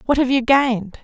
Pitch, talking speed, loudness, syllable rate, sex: 250 Hz, 235 wpm, -17 LUFS, 5.8 syllables/s, female